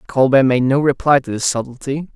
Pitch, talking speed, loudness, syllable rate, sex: 135 Hz, 195 wpm, -16 LUFS, 5.6 syllables/s, male